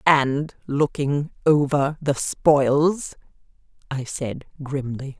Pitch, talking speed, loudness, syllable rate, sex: 140 Hz, 90 wpm, -22 LUFS, 2.8 syllables/s, female